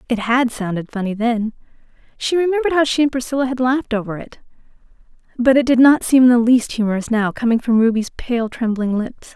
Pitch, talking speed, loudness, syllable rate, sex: 240 Hz, 195 wpm, -17 LUFS, 5.9 syllables/s, female